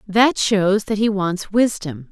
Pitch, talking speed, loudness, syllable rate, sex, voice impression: 200 Hz, 170 wpm, -18 LUFS, 3.6 syllables/s, female, feminine, adult-like, tensed, powerful, clear, intellectual, slightly calm, slightly friendly, elegant, lively, sharp